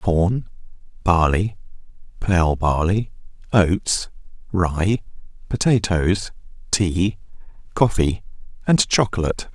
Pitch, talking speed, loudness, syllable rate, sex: 95 Hz, 70 wpm, -20 LUFS, 3.4 syllables/s, male